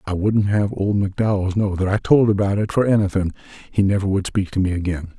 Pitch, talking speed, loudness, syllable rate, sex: 100 Hz, 220 wpm, -20 LUFS, 6.1 syllables/s, male